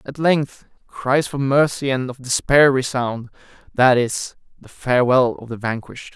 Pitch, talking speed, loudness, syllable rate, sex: 130 Hz, 155 wpm, -19 LUFS, 4.4 syllables/s, male